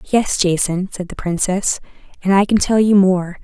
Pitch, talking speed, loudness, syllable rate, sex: 190 Hz, 190 wpm, -17 LUFS, 4.5 syllables/s, female